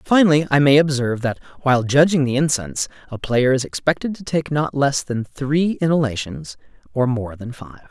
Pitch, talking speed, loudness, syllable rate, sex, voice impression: 135 Hz, 180 wpm, -19 LUFS, 5.3 syllables/s, male, masculine, adult-like, slightly clear, slightly cool, refreshing, slightly unique